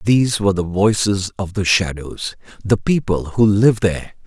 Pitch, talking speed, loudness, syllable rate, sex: 100 Hz, 170 wpm, -17 LUFS, 4.7 syllables/s, male